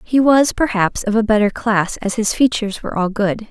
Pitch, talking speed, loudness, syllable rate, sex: 215 Hz, 220 wpm, -17 LUFS, 5.3 syllables/s, female